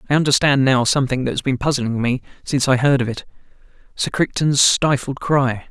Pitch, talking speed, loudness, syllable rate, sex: 135 Hz, 180 wpm, -18 LUFS, 5.7 syllables/s, male